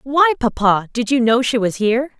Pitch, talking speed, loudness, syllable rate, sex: 240 Hz, 220 wpm, -17 LUFS, 5.1 syllables/s, female